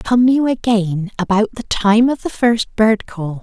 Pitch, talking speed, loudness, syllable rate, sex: 220 Hz, 195 wpm, -16 LUFS, 4.0 syllables/s, female